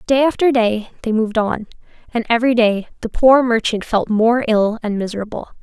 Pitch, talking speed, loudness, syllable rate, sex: 230 Hz, 180 wpm, -17 LUFS, 5.5 syllables/s, female